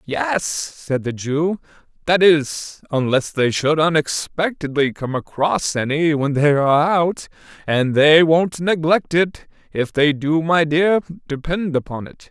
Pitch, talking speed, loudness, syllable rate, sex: 155 Hz, 145 wpm, -18 LUFS, 3.8 syllables/s, male